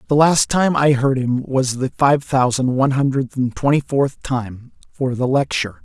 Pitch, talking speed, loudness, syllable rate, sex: 135 Hz, 185 wpm, -18 LUFS, 4.5 syllables/s, male